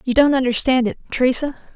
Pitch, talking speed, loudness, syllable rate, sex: 260 Hz, 170 wpm, -18 LUFS, 6.6 syllables/s, female